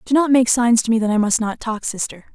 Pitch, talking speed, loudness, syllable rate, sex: 230 Hz, 305 wpm, -18 LUFS, 6.0 syllables/s, female